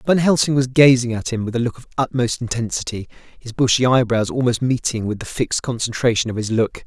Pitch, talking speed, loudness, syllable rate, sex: 120 Hz, 210 wpm, -19 LUFS, 6.0 syllables/s, male